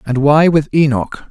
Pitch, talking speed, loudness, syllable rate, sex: 145 Hz, 185 wpm, -13 LUFS, 4.7 syllables/s, male